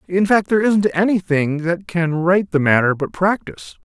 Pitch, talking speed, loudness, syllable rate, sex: 170 Hz, 185 wpm, -17 LUFS, 4.9 syllables/s, male